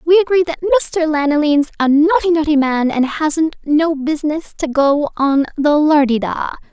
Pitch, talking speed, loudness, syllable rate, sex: 305 Hz, 170 wpm, -15 LUFS, 4.8 syllables/s, female